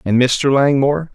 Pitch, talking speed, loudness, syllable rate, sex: 135 Hz, 155 wpm, -15 LUFS, 4.8 syllables/s, male